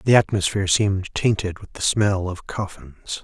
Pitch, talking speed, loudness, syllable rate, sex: 95 Hz, 165 wpm, -22 LUFS, 4.9 syllables/s, male